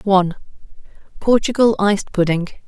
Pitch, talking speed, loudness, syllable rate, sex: 200 Hz, 65 wpm, -17 LUFS, 5.0 syllables/s, female